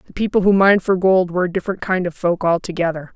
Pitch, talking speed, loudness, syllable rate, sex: 180 Hz, 245 wpm, -17 LUFS, 7.0 syllables/s, female